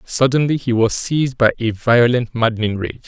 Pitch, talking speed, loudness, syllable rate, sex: 120 Hz, 175 wpm, -17 LUFS, 5.2 syllables/s, male